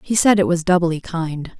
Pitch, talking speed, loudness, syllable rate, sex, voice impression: 170 Hz, 225 wpm, -18 LUFS, 4.7 syllables/s, female, very masculine, slightly adult-like, slightly thin, slightly relaxed, slightly weak, slightly dark, slightly hard, clear, fluent, slightly raspy, cute, intellectual, very refreshing, sincere, calm, mature, very friendly, reassuring, unique, elegant, slightly wild, very sweet, lively, kind, slightly sharp, light